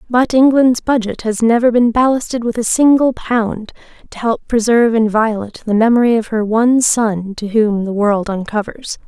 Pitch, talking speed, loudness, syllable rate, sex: 225 Hz, 170 wpm, -14 LUFS, 5.0 syllables/s, female